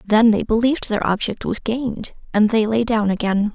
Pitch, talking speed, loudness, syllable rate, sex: 220 Hz, 205 wpm, -19 LUFS, 5.2 syllables/s, female